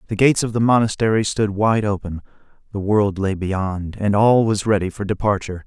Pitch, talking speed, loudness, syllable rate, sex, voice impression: 105 Hz, 190 wpm, -19 LUFS, 5.4 syllables/s, male, masculine, adult-like, tensed, slightly weak, soft, slightly muffled, intellectual, calm, friendly, reassuring, wild, kind, modest